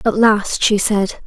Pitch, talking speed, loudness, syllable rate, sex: 210 Hz, 190 wpm, -15 LUFS, 3.5 syllables/s, female